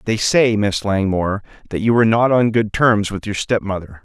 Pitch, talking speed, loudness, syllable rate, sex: 105 Hz, 210 wpm, -17 LUFS, 5.3 syllables/s, male